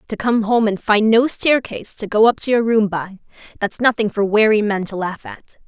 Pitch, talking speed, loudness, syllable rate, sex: 215 Hz, 220 wpm, -17 LUFS, 5.1 syllables/s, female